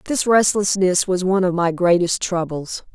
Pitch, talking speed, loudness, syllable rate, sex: 185 Hz, 165 wpm, -18 LUFS, 4.8 syllables/s, female